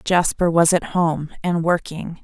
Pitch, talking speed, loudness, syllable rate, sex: 170 Hz, 160 wpm, -19 LUFS, 3.9 syllables/s, female